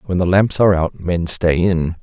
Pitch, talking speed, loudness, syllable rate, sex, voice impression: 90 Hz, 240 wpm, -16 LUFS, 4.9 syllables/s, male, masculine, middle-aged, thick, slightly relaxed, slightly powerful, clear, slightly halting, cool, intellectual, calm, slightly mature, friendly, reassuring, wild, lively, slightly kind